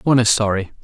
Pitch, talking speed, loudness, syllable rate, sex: 115 Hz, 215 wpm, -17 LUFS, 7.7 syllables/s, male